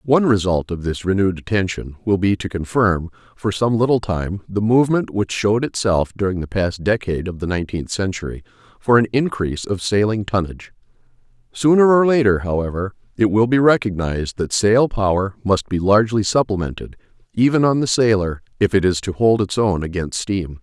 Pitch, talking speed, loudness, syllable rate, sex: 100 Hz, 175 wpm, -18 LUFS, 5.6 syllables/s, male